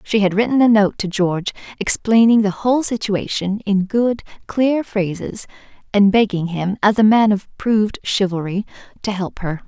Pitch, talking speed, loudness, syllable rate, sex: 205 Hz, 165 wpm, -18 LUFS, 4.8 syllables/s, female